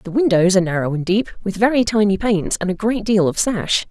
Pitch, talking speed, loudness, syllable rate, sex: 200 Hz, 245 wpm, -18 LUFS, 6.0 syllables/s, female